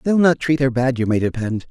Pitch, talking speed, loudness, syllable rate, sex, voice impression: 130 Hz, 280 wpm, -18 LUFS, 5.7 syllables/s, male, masculine, adult-like, slightly thick, slightly sincere, slightly calm, kind